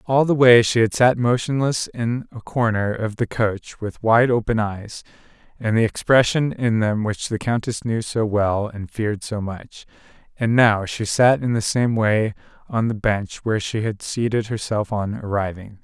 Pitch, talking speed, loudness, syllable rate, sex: 110 Hz, 190 wpm, -20 LUFS, 4.4 syllables/s, male